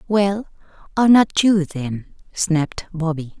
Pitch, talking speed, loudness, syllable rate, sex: 180 Hz, 125 wpm, -19 LUFS, 4.3 syllables/s, female